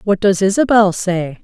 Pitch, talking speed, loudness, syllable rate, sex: 195 Hz, 165 wpm, -14 LUFS, 4.6 syllables/s, female